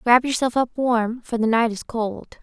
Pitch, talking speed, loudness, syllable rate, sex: 235 Hz, 225 wpm, -21 LUFS, 4.8 syllables/s, female